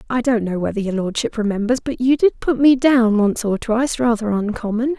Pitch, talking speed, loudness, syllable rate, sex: 230 Hz, 215 wpm, -18 LUFS, 5.4 syllables/s, female